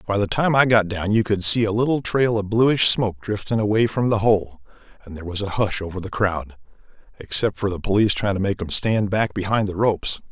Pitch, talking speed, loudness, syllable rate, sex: 105 Hz, 240 wpm, -20 LUFS, 5.7 syllables/s, male